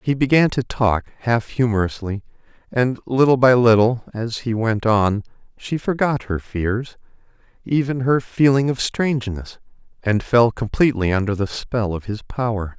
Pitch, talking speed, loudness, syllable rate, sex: 115 Hz, 150 wpm, -19 LUFS, 4.6 syllables/s, male